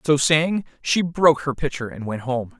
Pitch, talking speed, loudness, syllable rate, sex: 145 Hz, 210 wpm, -21 LUFS, 4.8 syllables/s, male